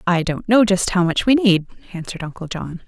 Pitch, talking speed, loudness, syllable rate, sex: 190 Hz, 230 wpm, -18 LUFS, 5.7 syllables/s, female